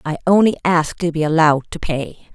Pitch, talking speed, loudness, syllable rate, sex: 165 Hz, 205 wpm, -17 LUFS, 6.0 syllables/s, female